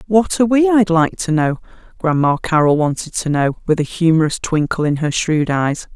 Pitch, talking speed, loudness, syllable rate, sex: 165 Hz, 200 wpm, -16 LUFS, 5.1 syllables/s, female